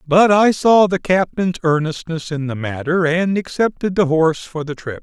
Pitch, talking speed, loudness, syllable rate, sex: 170 Hz, 190 wpm, -17 LUFS, 4.8 syllables/s, male